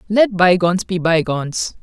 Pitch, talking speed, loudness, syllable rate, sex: 180 Hz, 130 wpm, -16 LUFS, 5.0 syllables/s, male